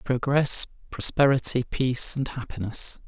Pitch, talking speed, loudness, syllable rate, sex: 130 Hz, 100 wpm, -23 LUFS, 4.6 syllables/s, male